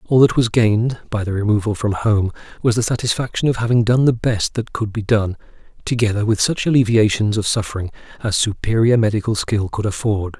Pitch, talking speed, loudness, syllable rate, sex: 110 Hz, 190 wpm, -18 LUFS, 5.7 syllables/s, male